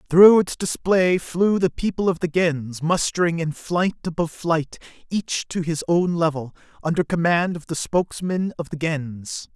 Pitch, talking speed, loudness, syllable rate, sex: 170 Hz, 170 wpm, -21 LUFS, 4.5 syllables/s, male